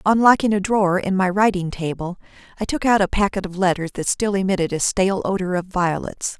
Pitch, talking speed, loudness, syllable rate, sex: 190 Hz, 205 wpm, -20 LUFS, 5.8 syllables/s, female